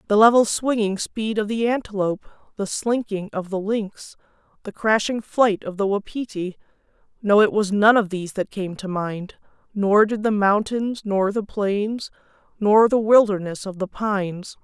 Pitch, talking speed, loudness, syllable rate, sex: 205 Hz, 165 wpm, -21 LUFS, 4.6 syllables/s, female